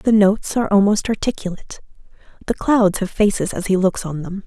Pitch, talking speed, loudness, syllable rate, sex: 200 Hz, 190 wpm, -18 LUFS, 5.9 syllables/s, female